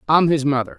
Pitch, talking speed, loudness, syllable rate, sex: 145 Hz, 230 wpm, -18 LUFS, 6.4 syllables/s, male